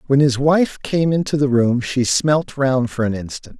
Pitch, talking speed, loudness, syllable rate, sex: 135 Hz, 215 wpm, -18 LUFS, 4.5 syllables/s, male